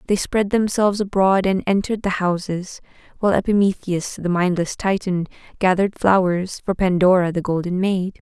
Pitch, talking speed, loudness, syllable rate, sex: 185 Hz, 145 wpm, -20 LUFS, 5.2 syllables/s, female